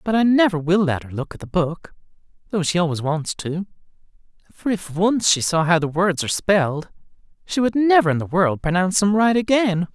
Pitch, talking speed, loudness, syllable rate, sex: 180 Hz, 210 wpm, -20 LUFS, 5.5 syllables/s, male